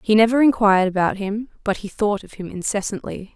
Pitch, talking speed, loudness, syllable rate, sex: 205 Hz, 195 wpm, -20 LUFS, 5.8 syllables/s, female